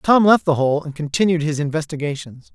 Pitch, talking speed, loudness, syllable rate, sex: 160 Hz, 190 wpm, -18 LUFS, 5.6 syllables/s, male